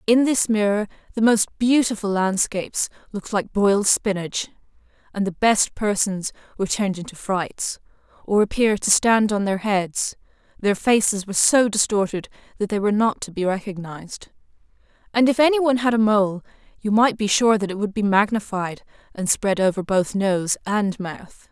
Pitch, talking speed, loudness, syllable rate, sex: 205 Hz, 165 wpm, -21 LUFS, 5.1 syllables/s, female